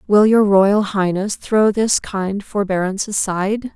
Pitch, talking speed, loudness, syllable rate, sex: 200 Hz, 145 wpm, -17 LUFS, 4.2 syllables/s, female